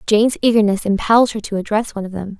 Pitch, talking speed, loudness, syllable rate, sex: 210 Hz, 225 wpm, -17 LUFS, 7.1 syllables/s, female